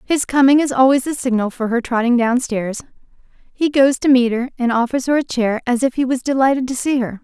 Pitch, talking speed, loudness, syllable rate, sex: 255 Hz, 240 wpm, -17 LUFS, 5.7 syllables/s, female